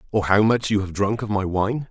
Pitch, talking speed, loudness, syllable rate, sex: 105 Hz, 285 wpm, -21 LUFS, 5.4 syllables/s, male